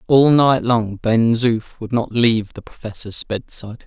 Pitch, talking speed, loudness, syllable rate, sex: 115 Hz, 170 wpm, -18 LUFS, 4.6 syllables/s, male